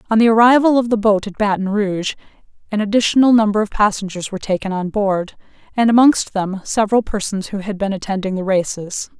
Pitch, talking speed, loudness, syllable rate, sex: 205 Hz, 190 wpm, -17 LUFS, 6.1 syllables/s, female